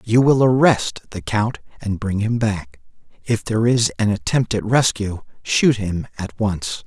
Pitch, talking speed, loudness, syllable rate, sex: 115 Hz, 175 wpm, -19 LUFS, 4.2 syllables/s, male